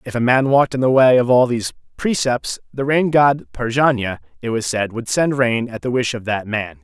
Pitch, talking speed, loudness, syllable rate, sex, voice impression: 125 Hz, 235 wpm, -18 LUFS, 5.2 syllables/s, male, very masculine, very adult-like, middle-aged, thick, tensed, powerful, bright, slightly hard, very clear, very fluent, cool, very intellectual, refreshing, sincere, calm, mature, very friendly, very reassuring, slightly unique, elegant, slightly wild, very lively, slightly kind, intense